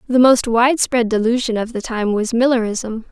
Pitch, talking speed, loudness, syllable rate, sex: 235 Hz, 175 wpm, -17 LUFS, 5.1 syllables/s, female